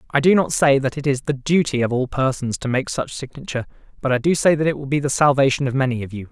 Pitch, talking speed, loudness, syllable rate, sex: 135 Hz, 285 wpm, -20 LUFS, 6.6 syllables/s, male